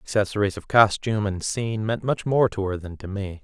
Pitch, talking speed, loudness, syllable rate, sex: 105 Hz, 225 wpm, -23 LUFS, 5.6 syllables/s, male